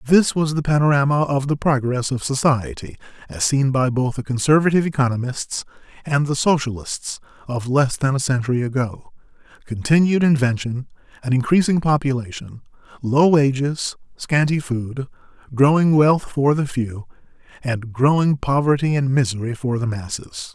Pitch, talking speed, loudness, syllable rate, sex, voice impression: 135 Hz, 135 wpm, -19 LUFS, 4.9 syllables/s, male, very masculine, very adult-like, old, very thick, tensed, powerful, slightly dark, hard, muffled, fluent, raspy, cool, intellectual, sincere, slightly calm, very mature, very friendly, reassuring, very unique, slightly elegant, very wild, sweet, lively, slightly kind, intense